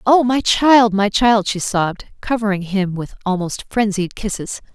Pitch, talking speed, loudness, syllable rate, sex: 210 Hz, 165 wpm, -17 LUFS, 4.4 syllables/s, female